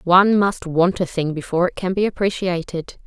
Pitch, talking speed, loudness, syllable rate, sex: 180 Hz, 195 wpm, -20 LUFS, 5.5 syllables/s, female